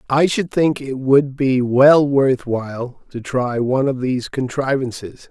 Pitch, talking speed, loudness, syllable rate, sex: 135 Hz, 170 wpm, -17 LUFS, 4.2 syllables/s, male